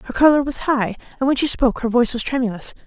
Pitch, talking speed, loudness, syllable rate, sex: 250 Hz, 250 wpm, -19 LUFS, 7.2 syllables/s, female